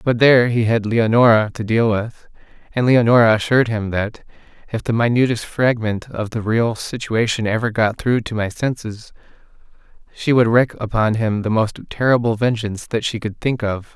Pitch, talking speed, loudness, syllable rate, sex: 115 Hz, 175 wpm, -18 LUFS, 5.0 syllables/s, male